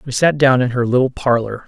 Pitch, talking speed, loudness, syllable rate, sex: 125 Hz, 250 wpm, -16 LUFS, 5.8 syllables/s, male